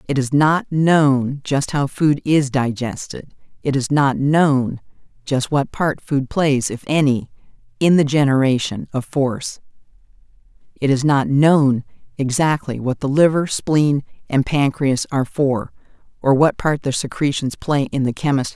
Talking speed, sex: 160 wpm, female